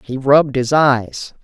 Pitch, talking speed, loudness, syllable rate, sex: 135 Hz, 165 wpm, -14 LUFS, 3.9 syllables/s, female